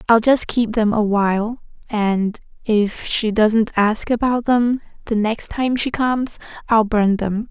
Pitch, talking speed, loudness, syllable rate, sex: 220 Hz, 160 wpm, -18 LUFS, 3.9 syllables/s, female